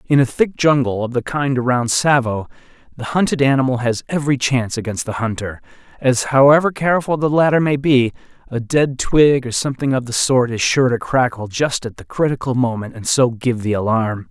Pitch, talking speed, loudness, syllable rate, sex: 130 Hz, 195 wpm, -17 LUFS, 5.3 syllables/s, male